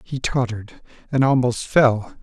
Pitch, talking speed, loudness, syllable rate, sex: 125 Hz, 135 wpm, -20 LUFS, 4.4 syllables/s, male